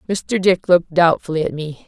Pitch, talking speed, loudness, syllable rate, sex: 170 Hz, 190 wpm, -17 LUFS, 5.4 syllables/s, female